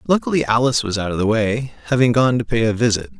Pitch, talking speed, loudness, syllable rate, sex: 115 Hz, 245 wpm, -18 LUFS, 6.8 syllables/s, male